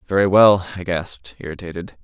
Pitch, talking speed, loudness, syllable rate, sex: 90 Hz, 150 wpm, -17 LUFS, 5.7 syllables/s, male